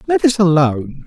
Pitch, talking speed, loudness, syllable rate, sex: 155 Hz, 170 wpm, -14 LUFS, 5.5 syllables/s, male